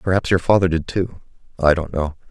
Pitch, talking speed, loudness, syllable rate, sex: 85 Hz, 210 wpm, -19 LUFS, 5.7 syllables/s, male